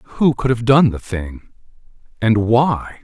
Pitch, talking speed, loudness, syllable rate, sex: 115 Hz, 140 wpm, -17 LUFS, 3.5 syllables/s, male